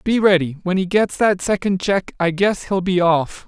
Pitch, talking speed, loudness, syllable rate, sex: 185 Hz, 205 wpm, -18 LUFS, 4.9 syllables/s, male